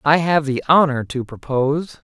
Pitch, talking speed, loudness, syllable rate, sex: 145 Hz, 170 wpm, -18 LUFS, 4.8 syllables/s, male